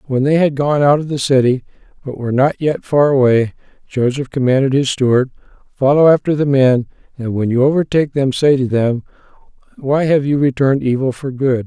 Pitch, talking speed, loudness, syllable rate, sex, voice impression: 135 Hz, 190 wpm, -15 LUFS, 5.6 syllables/s, male, masculine, slightly middle-aged, slightly soft, slightly muffled, calm, elegant, slightly wild